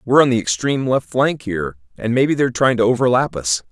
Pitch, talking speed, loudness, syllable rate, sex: 120 Hz, 225 wpm, -18 LUFS, 6.6 syllables/s, male